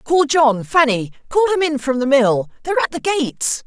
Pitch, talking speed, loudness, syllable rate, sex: 280 Hz, 195 wpm, -17 LUFS, 5.3 syllables/s, female